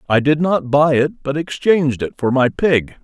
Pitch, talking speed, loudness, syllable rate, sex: 145 Hz, 215 wpm, -16 LUFS, 4.9 syllables/s, male